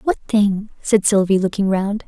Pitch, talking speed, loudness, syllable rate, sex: 200 Hz, 175 wpm, -18 LUFS, 4.2 syllables/s, female